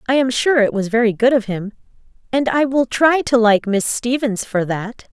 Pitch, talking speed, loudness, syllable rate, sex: 235 Hz, 220 wpm, -17 LUFS, 4.8 syllables/s, female